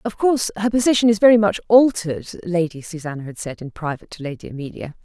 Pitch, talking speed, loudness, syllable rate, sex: 185 Hz, 200 wpm, -19 LUFS, 6.6 syllables/s, female